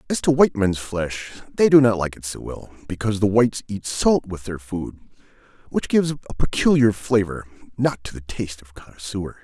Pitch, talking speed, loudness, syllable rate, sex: 105 Hz, 195 wpm, -21 LUFS, 5.6 syllables/s, male